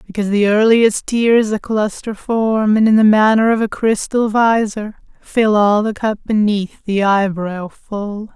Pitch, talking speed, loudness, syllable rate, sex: 215 Hz, 165 wpm, -15 LUFS, 4.1 syllables/s, female